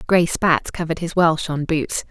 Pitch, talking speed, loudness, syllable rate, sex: 165 Hz, 200 wpm, -20 LUFS, 5.3 syllables/s, female